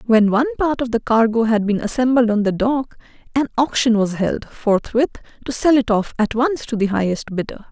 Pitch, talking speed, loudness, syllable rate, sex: 235 Hz, 210 wpm, -18 LUFS, 5.4 syllables/s, female